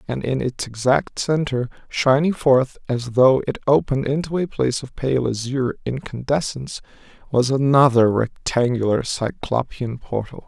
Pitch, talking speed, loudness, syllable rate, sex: 130 Hz, 130 wpm, -20 LUFS, 4.7 syllables/s, male